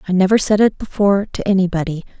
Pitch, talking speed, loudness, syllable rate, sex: 190 Hz, 165 wpm, -16 LUFS, 7.0 syllables/s, female